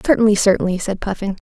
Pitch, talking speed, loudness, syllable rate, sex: 200 Hz, 160 wpm, -17 LUFS, 7.1 syllables/s, female